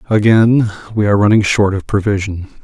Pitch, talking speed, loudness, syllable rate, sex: 105 Hz, 160 wpm, -13 LUFS, 6.1 syllables/s, male